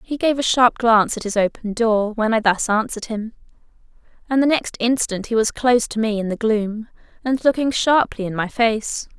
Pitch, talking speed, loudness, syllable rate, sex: 225 Hz, 210 wpm, -19 LUFS, 5.2 syllables/s, female